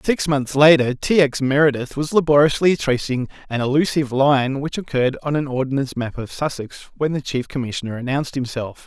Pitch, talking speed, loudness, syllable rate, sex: 140 Hz, 175 wpm, -19 LUFS, 5.7 syllables/s, male